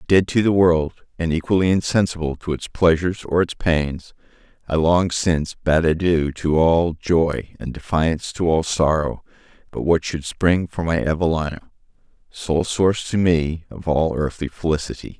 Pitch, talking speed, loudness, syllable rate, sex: 80 Hz, 160 wpm, -20 LUFS, 4.8 syllables/s, male